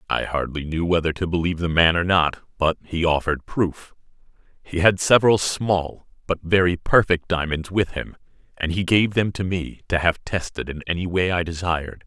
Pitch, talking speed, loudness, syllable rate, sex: 85 Hz, 190 wpm, -21 LUFS, 5.2 syllables/s, male